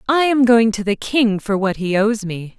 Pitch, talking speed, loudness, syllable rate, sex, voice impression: 220 Hz, 255 wpm, -17 LUFS, 4.5 syllables/s, female, feminine, adult-like, tensed, powerful, bright, clear, fluent, intellectual, friendly, elegant, lively, slightly strict, slightly sharp